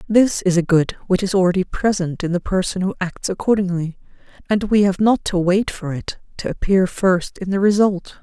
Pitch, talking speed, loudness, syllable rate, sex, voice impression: 190 Hz, 205 wpm, -19 LUFS, 5.1 syllables/s, female, feminine, adult-like, tensed, powerful, clear, fluent, intellectual, calm, elegant, slightly lively, slightly sharp